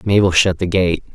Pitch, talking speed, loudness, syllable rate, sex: 90 Hz, 210 wpm, -15 LUFS, 5.2 syllables/s, male